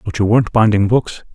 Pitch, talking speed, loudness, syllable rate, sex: 110 Hz, 225 wpm, -14 LUFS, 5.9 syllables/s, male